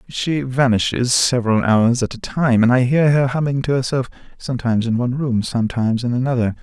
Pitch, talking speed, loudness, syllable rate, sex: 125 Hz, 190 wpm, -18 LUFS, 5.9 syllables/s, male